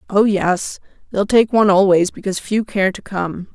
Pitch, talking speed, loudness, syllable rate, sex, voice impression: 195 Hz, 185 wpm, -17 LUFS, 5.0 syllables/s, female, very feminine, adult-like, slightly middle-aged, thin, slightly relaxed, slightly weak, slightly dark, soft, slightly muffled, fluent, slightly raspy, slightly cute, intellectual, slightly refreshing, sincere, very calm, friendly, reassuring, slightly unique, elegant, slightly sweet, slightly lively, kind, slightly modest